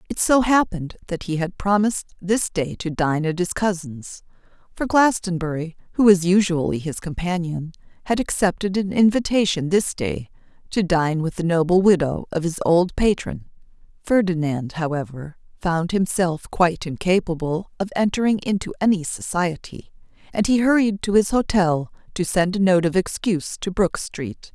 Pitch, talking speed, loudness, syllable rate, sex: 180 Hz, 155 wpm, -21 LUFS, 4.9 syllables/s, female